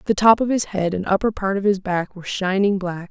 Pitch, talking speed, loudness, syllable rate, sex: 195 Hz, 270 wpm, -20 LUFS, 5.8 syllables/s, female